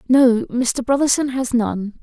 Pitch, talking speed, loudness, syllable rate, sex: 250 Hz, 150 wpm, -18 LUFS, 3.7 syllables/s, female